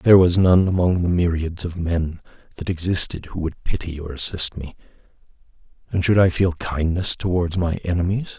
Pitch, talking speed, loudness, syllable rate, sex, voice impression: 85 Hz, 170 wpm, -21 LUFS, 5.2 syllables/s, male, masculine, middle-aged, thick, powerful, slightly dark, muffled, raspy, cool, intellectual, calm, mature, wild, slightly strict, slightly sharp